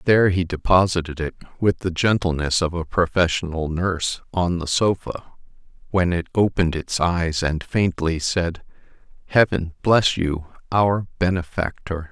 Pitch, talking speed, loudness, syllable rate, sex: 85 Hz, 135 wpm, -21 LUFS, 4.6 syllables/s, male